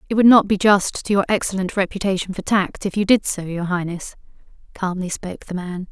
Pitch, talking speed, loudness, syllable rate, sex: 190 Hz, 215 wpm, -19 LUFS, 5.7 syllables/s, female